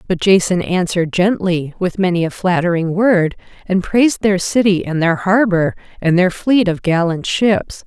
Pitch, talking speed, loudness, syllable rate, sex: 185 Hz, 170 wpm, -15 LUFS, 4.6 syllables/s, female